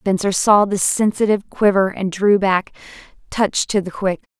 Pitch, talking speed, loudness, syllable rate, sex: 195 Hz, 165 wpm, -17 LUFS, 4.9 syllables/s, female